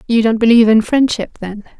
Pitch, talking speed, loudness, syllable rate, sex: 225 Hz, 200 wpm, -12 LUFS, 6.2 syllables/s, female